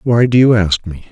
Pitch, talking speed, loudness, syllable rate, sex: 105 Hz, 270 wpm, -12 LUFS, 5.2 syllables/s, male